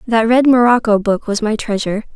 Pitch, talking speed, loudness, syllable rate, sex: 225 Hz, 195 wpm, -14 LUFS, 5.7 syllables/s, female